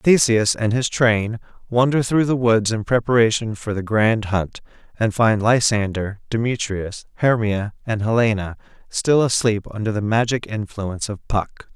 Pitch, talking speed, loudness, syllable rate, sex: 110 Hz, 150 wpm, -20 LUFS, 4.4 syllables/s, male